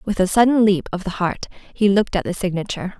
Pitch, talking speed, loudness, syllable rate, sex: 195 Hz, 240 wpm, -19 LUFS, 6.7 syllables/s, female